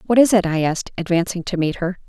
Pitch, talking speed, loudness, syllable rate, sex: 185 Hz, 260 wpm, -19 LUFS, 6.6 syllables/s, female